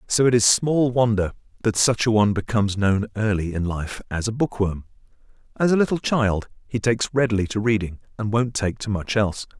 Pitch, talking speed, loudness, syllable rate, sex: 110 Hz, 205 wpm, -22 LUFS, 5.6 syllables/s, male